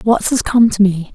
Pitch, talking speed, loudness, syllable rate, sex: 210 Hz, 260 wpm, -14 LUFS, 4.8 syllables/s, female